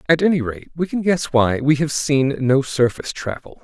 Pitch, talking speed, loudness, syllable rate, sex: 145 Hz, 215 wpm, -19 LUFS, 5.1 syllables/s, male